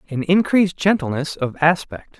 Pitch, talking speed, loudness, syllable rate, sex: 160 Hz, 135 wpm, -19 LUFS, 5.0 syllables/s, male